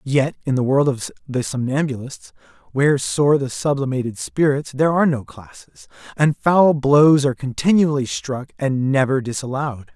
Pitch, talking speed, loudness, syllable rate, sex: 135 Hz, 150 wpm, -19 LUFS, 5.0 syllables/s, male